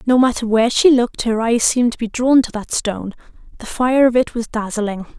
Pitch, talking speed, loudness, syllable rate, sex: 235 Hz, 230 wpm, -16 LUFS, 5.8 syllables/s, female